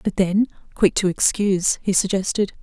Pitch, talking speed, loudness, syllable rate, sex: 195 Hz, 160 wpm, -20 LUFS, 5.1 syllables/s, female